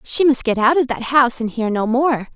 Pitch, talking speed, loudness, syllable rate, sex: 250 Hz, 280 wpm, -17 LUFS, 5.5 syllables/s, female